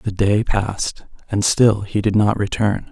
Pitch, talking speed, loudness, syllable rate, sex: 105 Hz, 185 wpm, -18 LUFS, 4.2 syllables/s, male